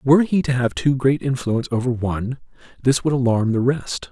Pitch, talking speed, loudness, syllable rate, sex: 130 Hz, 205 wpm, -20 LUFS, 5.6 syllables/s, male